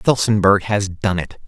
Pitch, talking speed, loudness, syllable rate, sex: 100 Hz, 165 wpm, -17 LUFS, 4.3 syllables/s, male